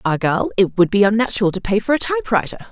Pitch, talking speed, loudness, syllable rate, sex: 210 Hz, 220 wpm, -17 LUFS, 6.6 syllables/s, female